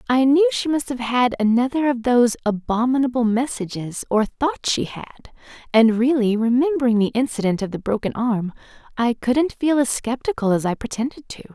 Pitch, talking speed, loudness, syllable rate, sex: 245 Hz, 160 wpm, -20 LUFS, 5.4 syllables/s, female